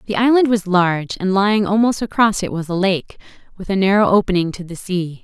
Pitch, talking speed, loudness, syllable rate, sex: 195 Hz, 220 wpm, -17 LUFS, 5.9 syllables/s, female